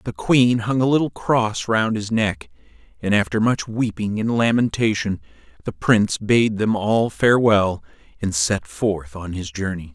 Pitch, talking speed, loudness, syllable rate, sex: 105 Hz, 165 wpm, -20 LUFS, 4.4 syllables/s, male